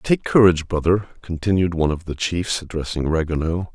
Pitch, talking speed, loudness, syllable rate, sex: 85 Hz, 160 wpm, -20 LUFS, 5.6 syllables/s, male